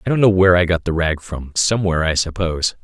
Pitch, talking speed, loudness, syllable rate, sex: 90 Hz, 230 wpm, -17 LUFS, 6.8 syllables/s, male